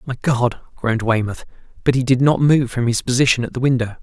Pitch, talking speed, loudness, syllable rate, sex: 125 Hz, 210 wpm, -18 LUFS, 6.2 syllables/s, male